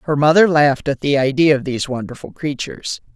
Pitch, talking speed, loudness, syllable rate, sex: 145 Hz, 190 wpm, -17 LUFS, 6.3 syllables/s, female